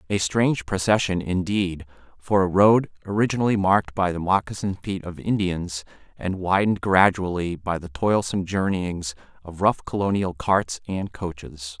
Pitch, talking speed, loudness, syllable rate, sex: 95 Hz, 140 wpm, -23 LUFS, 4.9 syllables/s, male